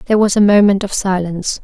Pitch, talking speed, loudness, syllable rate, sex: 195 Hz, 220 wpm, -13 LUFS, 6.3 syllables/s, female